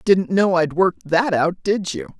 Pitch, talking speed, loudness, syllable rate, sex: 185 Hz, 220 wpm, -19 LUFS, 4.8 syllables/s, female